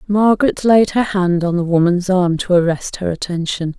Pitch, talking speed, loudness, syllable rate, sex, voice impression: 185 Hz, 190 wpm, -16 LUFS, 5.0 syllables/s, female, feminine, middle-aged, slightly relaxed, powerful, clear, halting, slightly intellectual, slightly friendly, unique, lively, slightly strict, slightly sharp